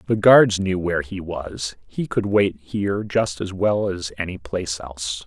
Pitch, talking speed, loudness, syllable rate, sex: 95 Hz, 180 wpm, -21 LUFS, 4.5 syllables/s, male